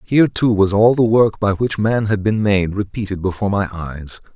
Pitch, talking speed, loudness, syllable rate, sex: 105 Hz, 220 wpm, -17 LUFS, 5.1 syllables/s, male